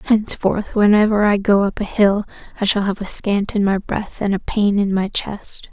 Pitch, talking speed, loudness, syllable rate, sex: 200 Hz, 220 wpm, -18 LUFS, 4.8 syllables/s, female